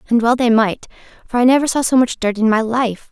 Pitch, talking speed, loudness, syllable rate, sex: 235 Hz, 270 wpm, -15 LUFS, 5.9 syllables/s, female